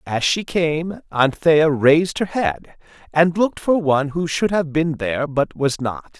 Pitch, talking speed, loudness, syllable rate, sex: 155 Hz, 185 wpm, -19 LUFS, 4.3 syllables/s, male